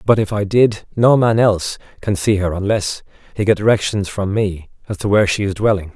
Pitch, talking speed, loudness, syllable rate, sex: 100 Hz, 220 wpm, -17 LUFS, 5.5 syllables/s, male